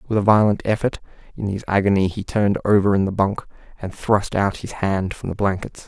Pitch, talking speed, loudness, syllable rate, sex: 100 Hz, 215 wpm, -20 LUFS, 5.6 syllables/s, male